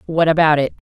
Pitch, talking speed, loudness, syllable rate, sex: 155 Hz, 190 wpm, -16 LUFS, 6.5 syllables/s, female